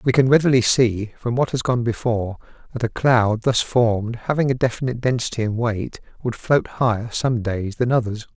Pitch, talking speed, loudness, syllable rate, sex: 120 Hz, 195 wpm, -20 LUFS, 5.2 syllables/s, male